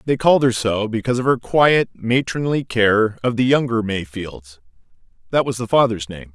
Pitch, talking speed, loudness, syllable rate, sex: 115 Hz, 170 wpm, -18 LUFS, 5.0 syllables/s, male